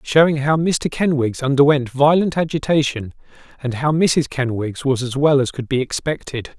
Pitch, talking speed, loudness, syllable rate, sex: 140 Hz, 165 wpm, -18 LUFS, 4.9 syllables/s, male